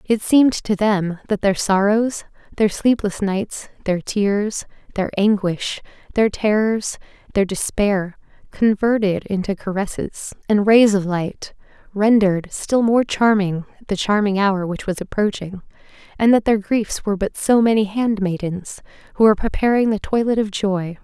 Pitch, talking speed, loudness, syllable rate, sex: 205 Hz, 145 wpm, -19 LUFS, 4.5 syllables/s, female